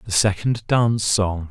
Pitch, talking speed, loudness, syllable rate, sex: 105 Hz, 160 wpm, -20 LUFS, 4.3 syllables/s, male